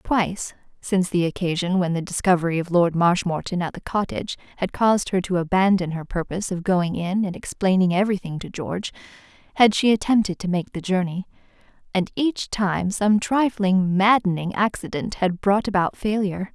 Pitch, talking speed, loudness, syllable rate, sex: 190 Hz, 165 wpm, -22 LUFS, 5.5 syllables/s, female